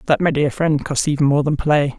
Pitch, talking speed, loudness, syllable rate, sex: 150 Hz, 270 wpm, -18 LUFS, 5.5 syllables/s, female